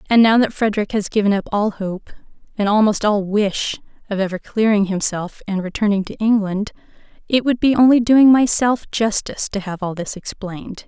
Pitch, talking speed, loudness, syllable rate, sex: 210 Hz, 180 wpm, -18 LUFS, 5.4 syllables/s, female